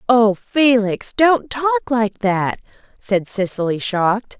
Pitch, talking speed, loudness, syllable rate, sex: 230 Hz, 125 wpm, -18 LUFS, 3.6 syllables/s, female